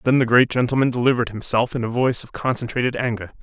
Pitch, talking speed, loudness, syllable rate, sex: 120 Hz, 210 wpm, -20 LUFS, 7.1 syllables/s, male